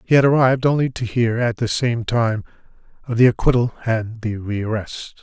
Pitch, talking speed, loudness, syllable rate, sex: 120 Hz, 185 wpm, -19 LUFS, 5.0 syllables/s, male